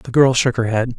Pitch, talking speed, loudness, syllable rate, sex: 120 Hz, 305 wpm, -16 LUFS, 5.4 syllables/s, male